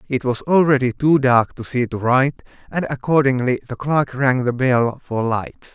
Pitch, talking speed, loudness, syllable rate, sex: 130 Hz, 190 wpm, -18 LUFS, 4.8 syllables/s, male